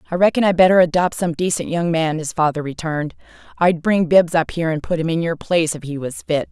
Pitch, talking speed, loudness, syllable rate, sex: 165 Hz, 250 wpm, -18 LUFS, 6.1 syllables/s, female